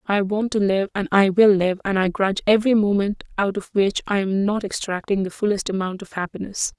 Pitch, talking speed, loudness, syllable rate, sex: 200 Hz, 220 wpm, -21 LUFS, 5.6 syllables/s, female